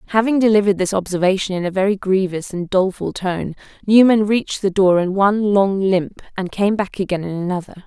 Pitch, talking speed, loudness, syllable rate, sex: 195 Hz, 190 wpm, -18 LUFS, 5.9 syllables/s, female